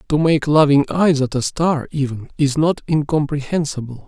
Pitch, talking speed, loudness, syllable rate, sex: 145 Hz, 160 wpm, -18 LUFS, 4.9 syllables/s, male